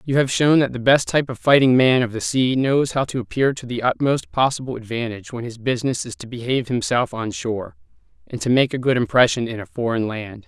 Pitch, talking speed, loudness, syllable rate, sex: 125 Hz, 235 wpm, -20 LUFS, 6.0 syllables/s, male